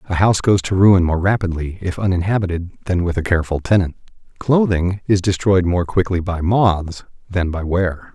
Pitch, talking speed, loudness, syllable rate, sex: 95 Hz, 175 wpm, -18 LUFS, 5.2 syllables/s, male